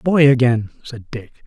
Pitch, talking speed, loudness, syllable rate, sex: 125 Hz, 165 wpm, -15 LUFS, 4.2 syllables/s, male